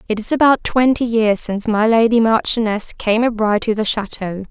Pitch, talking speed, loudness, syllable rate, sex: 220 Hz, 200 wpm, -16 LUFS, 5.4 syllables/s, female